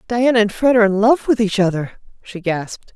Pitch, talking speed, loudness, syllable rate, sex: 210 Hz, 225 wpm, -16 LUFS, 5.8 syllables/s, female